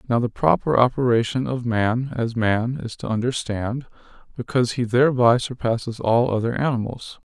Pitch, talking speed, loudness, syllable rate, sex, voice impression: 120 Hz, 150 wpm, -21 LUFS, 5.1 syllables/s, male, masculine, very adult-like, slightly thick, weak, slightly sincere, calm, slightly elegant